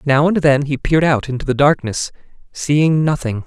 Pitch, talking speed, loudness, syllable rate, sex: 145 Hz, 190 wpm, -16 LUFS, 5.1 syllables/s, male